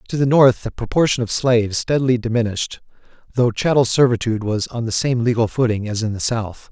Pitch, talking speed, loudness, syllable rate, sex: 120 Hz, 195 wpm, -18 LUFS, 6.2 syllables/s, male